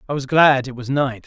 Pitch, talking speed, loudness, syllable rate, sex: 135 Hz, 285 wpm, -18 LUFS, 5.5 syllables/s, male